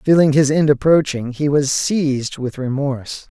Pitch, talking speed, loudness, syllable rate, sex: 140 Hz, 160 wpm, -17 LUFS, 4.7 syllables/s, male